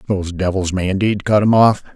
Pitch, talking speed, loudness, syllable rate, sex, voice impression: 100 Hz, 215 wpm, -16 LUFS, 6.0 syllables/s, male, very masculine, very adult-like, old, very thick, slightly relaxed, slightly weak, slightly dark, soft, slightly muffled, fluent, slightly raspy, very cool, very intellectual, sincere, very calm, very mature, friendly, reassuring, unique, wild, sweet, slightly kind